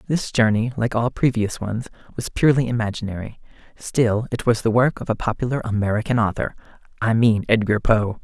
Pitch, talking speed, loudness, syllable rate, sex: 115 Hz, 170 wpm, -21 LUFS, 5.6 syllables/s, male